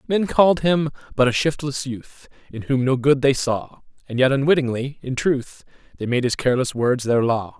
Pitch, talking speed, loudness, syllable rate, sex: 135 Hz, 200 wpm, -20 LUFS, 5.1 syllables/s, male